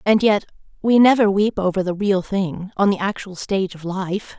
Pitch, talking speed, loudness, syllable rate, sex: 195 Hz, 205 wpm, -19 LUFS, 4.9 syllables/s, female